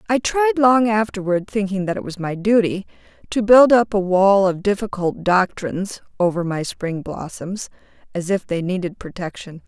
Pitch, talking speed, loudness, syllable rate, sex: 195 Hz, 165 wpm, -19 LUFS, 4.7 syllables/s, female